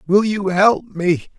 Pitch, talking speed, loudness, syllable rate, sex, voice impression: 195 Hz, 175 wpm, -17 LUFS, 3.5 syllables/s, male, very masculine, very adult-like, thick, tensed, slightly weak, slightly bright, very soft, slightly muffled, very fluent, cool, intellectual, very refreshing, very sincere, calm, slightly mature, very friendly, reassuring, unique, elegant, slightly wild, very sweet, very lively, kind, slightly intense, slightly light